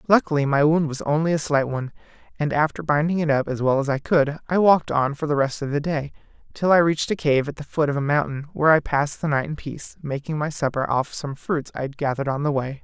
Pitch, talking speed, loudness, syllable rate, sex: 145 Hz, 265 wpm, -22 LUFS, 6.3 syllables/s, male